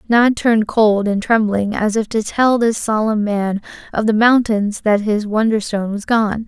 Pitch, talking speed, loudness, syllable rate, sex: 215 Hz, 185 wpm, -16 LUFS, 4.5 syllables/s, female